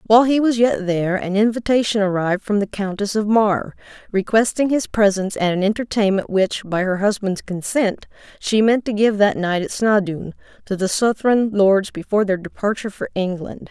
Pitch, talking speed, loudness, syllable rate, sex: 205 Hz, 180 wpm, -19 LUFS, 5.3 syllables/s, female